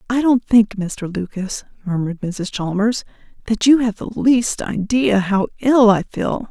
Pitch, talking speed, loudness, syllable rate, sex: 215 Hz, 165 wpm, -18 LUFS, 4.2 syllables/s, female